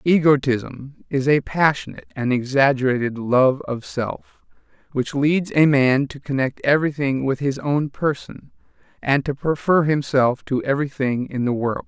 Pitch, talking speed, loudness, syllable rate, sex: 140 Hz, 145 wpm, -20 LUFS, 4.5 syllables/s, male